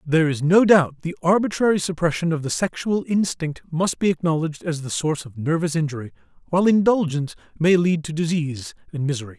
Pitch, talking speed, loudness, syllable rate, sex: 165 Hz, 180 wpm, -21 LUFS, 6.1 syllables/s, male